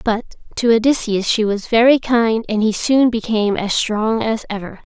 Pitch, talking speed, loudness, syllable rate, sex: 225 Hz, 185 wpm, -17 LUFS, 4.8 syllables/s, female